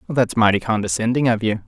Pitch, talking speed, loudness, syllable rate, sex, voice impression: 115 Hz, 180 wpm, -19 LUFS, 6.0 syllables/s, male, masculine, adult-like, tensed, powerful, clear, nasal, intellectual, slightly calm, friendly, slightly wild, slightly lively, slightly modest